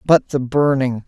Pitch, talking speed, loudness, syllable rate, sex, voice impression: 135 Hz, 170 wpm, -17 LUFS, 4.4 syllables/s, male, masculine, adult-like, slightly thick, clear, slightly refreshing, sincere, slightly lively